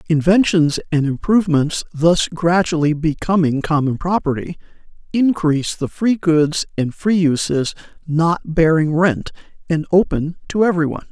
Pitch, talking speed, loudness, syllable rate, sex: 165 Hz, 125 wpm, -17 LUFS, 4.7 syllables/s, male